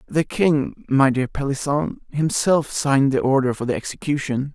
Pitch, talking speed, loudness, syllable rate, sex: 140 Hz, 160 wpm, -21 LUFS, 4.7 syllables/s, male